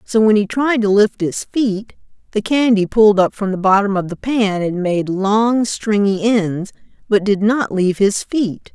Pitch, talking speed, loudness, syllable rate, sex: 205 Hz, 200 wpm, -16 LUFS, 4.3 syllables/s, female